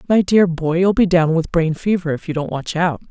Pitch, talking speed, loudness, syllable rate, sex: 170 Hz, 270 wpm, -17 LUFS, 5.3 syllables/s, female